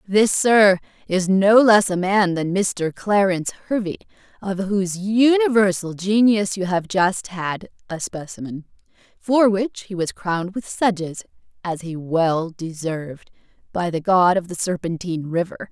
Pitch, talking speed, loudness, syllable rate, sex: 190 Hz, 150 wpm, -20 LUFS, 4.3 syllables/s, female